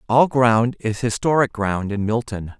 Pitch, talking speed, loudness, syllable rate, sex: 115 Hz, 160 wpm, -19 LUFS, 4.2 syllables/s, male